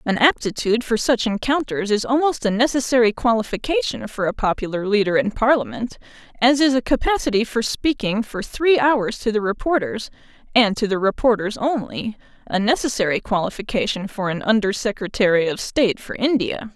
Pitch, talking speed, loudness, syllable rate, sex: 225 Hz, 150 wpm, -20 LUFS, 5.5 syllables/s, female